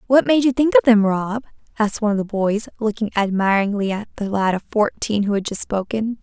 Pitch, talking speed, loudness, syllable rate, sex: 210 Hz, 220 wpm, -19 LUFS, 5.8 syllables/s, female